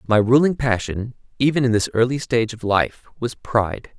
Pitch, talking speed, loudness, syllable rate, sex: 120 Hz, 180 wpm, -20 LUFS, 5.3 syllables/s, male